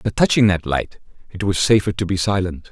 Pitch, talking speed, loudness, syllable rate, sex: 95 Hz, 220 wpm, -18 LUFS, 5.6 syllables/s, male